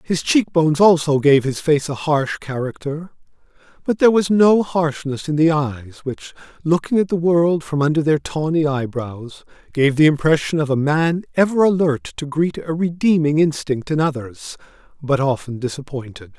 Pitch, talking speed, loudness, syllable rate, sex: 150 Hz, 165 wpm, -18 LUFS, 4.7 syllables/s, male